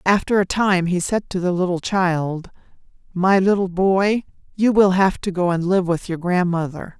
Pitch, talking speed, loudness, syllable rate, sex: 185 Hz, 190 wpm, -19 LUFS, 4.5 syllables/s, female